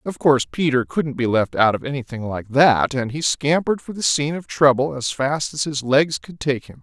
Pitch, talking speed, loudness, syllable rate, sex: 135 Hz, 235 wpm, -20 LUFS, 5.2 syllables/s, male